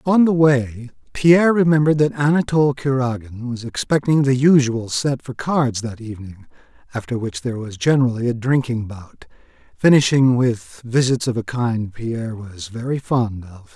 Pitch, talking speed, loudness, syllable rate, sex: 125 Hz, 155 wpm, -18 LUFS, 4.9 syllables/s, male